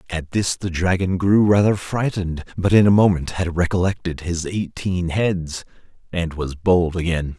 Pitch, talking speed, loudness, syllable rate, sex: 90 Hz, 160 wpm, -20 LUFS, 4.5 syllables/s, male